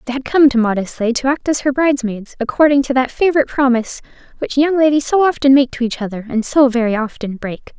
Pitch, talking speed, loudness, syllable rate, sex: 260 Hz, 225 wpm, -15 LUFS, 6.3 syllables/s, female